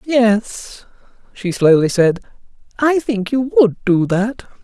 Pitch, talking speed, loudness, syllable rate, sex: 220 Hz, 130 wpm, -16 LUFS, 3.4 syllables/s, male